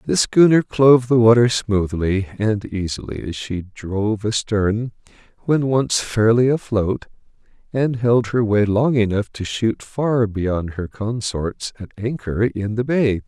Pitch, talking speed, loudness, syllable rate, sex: 110 Hz, 150 wpm, -19 LUFS, 4.0 syllables/s, male